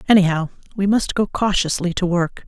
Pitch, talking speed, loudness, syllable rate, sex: 185 Hz, 170 wpm, -19 LUFS, 5.5 syllables/s, female